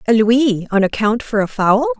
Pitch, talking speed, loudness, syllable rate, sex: 220 Hz, 210 wpm, -16 LUFS, 4.7 syllables/s, female